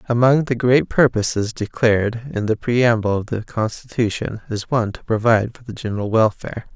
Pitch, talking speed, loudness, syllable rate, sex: 115 Hz, 170 wpm, -19 LUFS, 5.5 syllables/s, male